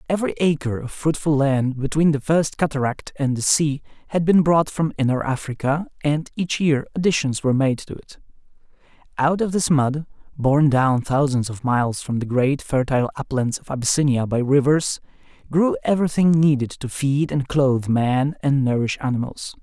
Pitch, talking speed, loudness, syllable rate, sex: 140 Hz, 170 wpm, -20 LUFS, 5.2 syllables/s, male